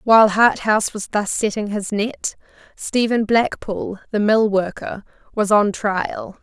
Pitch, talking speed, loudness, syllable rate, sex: 210 Hz, 140 wpm, -19 LUFS, 4.0 syllables/s, female